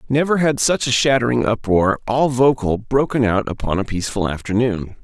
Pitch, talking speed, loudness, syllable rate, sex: 120 Hz, 165 wpm, -18 LUFS, 5.3 syllables/s, male